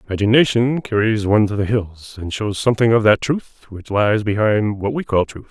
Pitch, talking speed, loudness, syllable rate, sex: 110 Hz, 205 wpm, -17 LUFS, 5.3 syllables/s, male